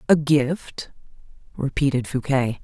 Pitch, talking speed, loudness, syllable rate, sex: 140 Hz, 90 wpm, -22 LUFS, 3.9 syllables/s, female